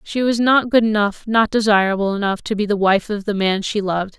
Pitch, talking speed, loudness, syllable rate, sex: 210 Hz, 245 wpm, -18 LUFS, 5.7 syllables/s, female